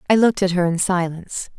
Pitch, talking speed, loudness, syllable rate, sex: 185 Hz, 225 wpm, -19 LUFS, 6.8 syllables/s, female